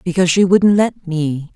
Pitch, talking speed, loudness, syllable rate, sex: 175 Hz, 195 wpm, -15 LUFS, 4.8 syllables/s, female